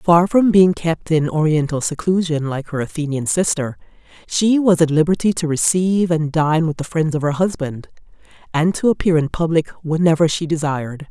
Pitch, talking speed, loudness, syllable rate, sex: 160 Hz, 180 wpm, -18 LUFS, 5.1 syllables/s, female